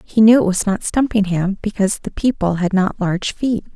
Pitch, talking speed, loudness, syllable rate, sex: 200 Hz, 210 wpm, -17 LUFS, 5.7 syllables/s, female